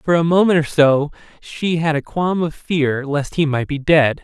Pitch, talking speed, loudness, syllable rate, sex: 155 Hz, 225 wpm, -17 LUFS, 4.4 syllables/s, male